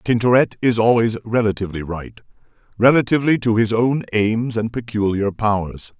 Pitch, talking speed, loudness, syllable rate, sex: 115 Hz, 120 wpm, -18 LUFS, 5.2 syllables/s, male